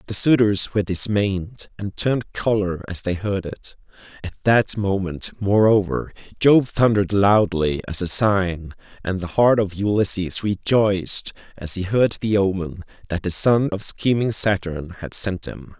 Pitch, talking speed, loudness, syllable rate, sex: 100 Hz, 155 wpm, -20 LUFS, 4.3 syllables/s, male